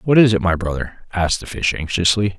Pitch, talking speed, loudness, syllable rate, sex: 95 Hz, 225 wpm, -18 LUFS, 5.6 syllables/s, male